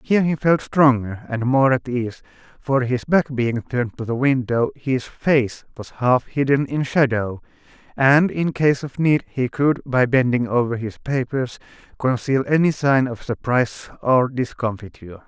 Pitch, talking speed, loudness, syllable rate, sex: 130 Hz, 165 wpm, -20 LUFS, 4.4 syllables/s, male